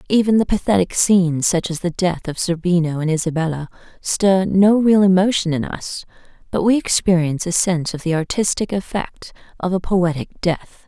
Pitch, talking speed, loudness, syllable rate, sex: 180 Hz, 170 wpm, -18 LUFS, 5.2 syllables/s, female